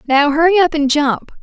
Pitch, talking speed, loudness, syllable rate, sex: 300 Hz, 210 wpm, -14 LUFS, 5.5 syllables/s, female